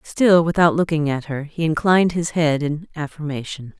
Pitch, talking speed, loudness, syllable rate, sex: 160 Hz, 175 wpm, -19 LUFS, 5.0 syllables/s, female